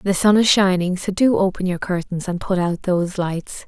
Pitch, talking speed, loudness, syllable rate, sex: 185 Hz, 230 wpm, -19 LUFS, 5.0 syllables/s, female